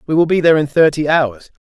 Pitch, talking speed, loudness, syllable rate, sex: 150 Hz, 250 wpm, -14 LUFS, 6.4 syllables/s, male